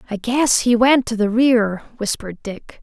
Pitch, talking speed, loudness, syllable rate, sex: 230 Hz, 190 wpm, -17 LUFS, 4.5 syllables/s, female